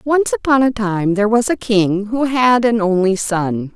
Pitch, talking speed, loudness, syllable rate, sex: 220 Hz, 210 wpm, -16 LUFS, 4.4 syllables/s, female